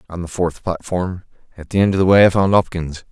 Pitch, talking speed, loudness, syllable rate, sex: 90 Hz, 250 wpm, -17 LUFS, 5.8 syllables/s, male